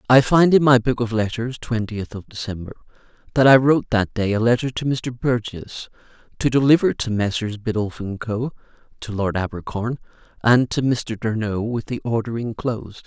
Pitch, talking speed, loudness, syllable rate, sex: 115 Hz, 165 wpm, -20 LUFS, 5.1 syllables/s, male